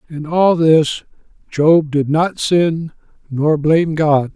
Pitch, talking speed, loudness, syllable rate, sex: 155 Hz, 140 wpm, -15 LUFS, 3.3 syllables/s, male